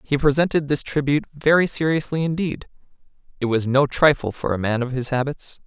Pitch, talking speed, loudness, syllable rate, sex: 140 Hz, 180 wpm, -21 LUFS, 5.7 syllables/s, male